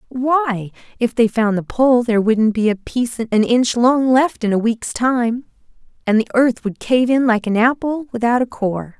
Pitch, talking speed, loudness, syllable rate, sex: 235 Hz, 205 wpm, -17 LUFS, 4.5 syllables/s, female